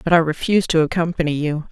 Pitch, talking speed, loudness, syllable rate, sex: 160 Hz, 210 wpm, -19 LUFS, 6.9 syllables/s, female